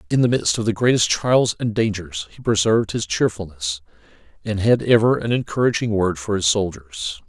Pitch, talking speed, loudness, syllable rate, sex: 100 Hz, 180 wpm, -20 LUFS, 5.2 syllables/s, male